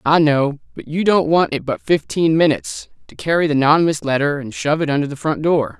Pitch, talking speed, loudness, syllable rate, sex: 155 Hz, 230 wpm, -17 LUFS, 5.8 syllables/s, male